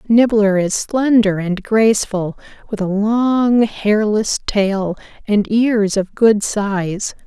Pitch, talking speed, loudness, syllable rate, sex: 210 Hz, 125 wpm, -16 LUFS, 3.1 syllables/s, female